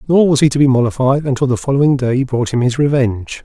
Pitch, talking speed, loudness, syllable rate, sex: 130 Hz, 245 wpm, -14 LUFS, 6.5 syllables/s, male